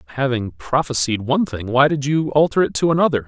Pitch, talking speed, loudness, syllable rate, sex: 130 Hz, 200 wpm, -18 LUFS, 5.9 syllables/s, male